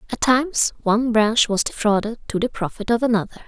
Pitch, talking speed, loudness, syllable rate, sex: 225 Hz, 190 wpm, -20 LUFS, 6.1 syllables/s, female